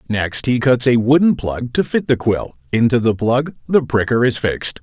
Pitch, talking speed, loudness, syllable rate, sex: 120 Hz, 210 wpm, -17 LUFS, 4.8 syllables/s, male